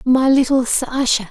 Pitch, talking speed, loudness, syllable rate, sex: 255 Hz, 140 wpm, -16 LUFS, 4.1 syllables/s, female